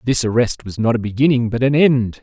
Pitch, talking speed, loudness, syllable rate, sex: 120 Hz, 240 wpm, -16 LUFS, 5.7 syllables/s, male